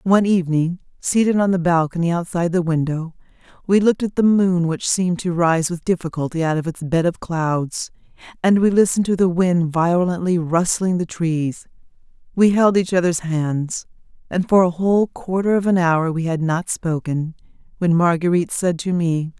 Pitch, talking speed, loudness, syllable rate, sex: 175 Hz, 180 wpm, -19 LUFS, 5.1 syllables/s, female